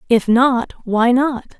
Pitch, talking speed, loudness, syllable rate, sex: 245 Hz, 150 wpm, -16 LUFS, 3.4 syllables/s, female